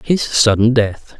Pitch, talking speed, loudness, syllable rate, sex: 115 Hz, 150 wpm, -14 LUFS, 3.7 syllables/s, male